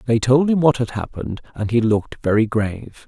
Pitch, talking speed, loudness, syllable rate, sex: 120 Hz, 215 wpm, -19 LUFS, 5.8 syllables/s, male